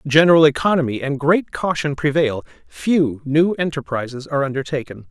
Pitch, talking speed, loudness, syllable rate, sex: 145 Hz, 130 wpm, -18 LUFS, 5.3 syllables/s, male